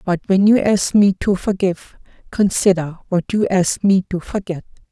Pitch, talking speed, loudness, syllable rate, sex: 190 Hz, 170 wpm, -17 LUFS, 4.8 syllables/s, female